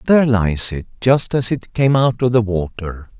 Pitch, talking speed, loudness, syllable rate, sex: 115 Hz, 205 wpm, -17 LUFS, 4.6 syllables/s, male